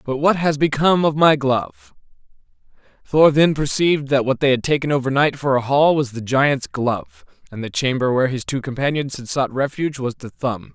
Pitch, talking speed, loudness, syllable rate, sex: 135 Hz, 200 wpm, -19 LUFS, 5.6 syllables/s, male